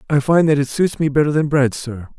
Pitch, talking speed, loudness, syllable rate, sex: 145 Hz, 275 wpm, -16 LUFS, 5.7 syllables/s, male